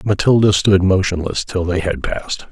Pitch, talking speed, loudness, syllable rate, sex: 95 Hz, 165 wpm, -16 LUFS, 5.0 syllables/s, male